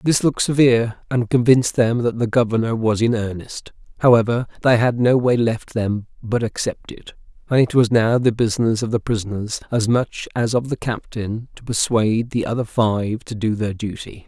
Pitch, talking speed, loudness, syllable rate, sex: 115 Hz, 195 wpm, -19 LUFS, 5.1 syllables/s, male